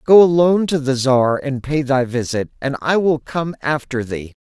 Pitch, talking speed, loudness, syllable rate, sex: 140 Hz, 205 wpm, -17 LUFS, 4.7 syllables/s, male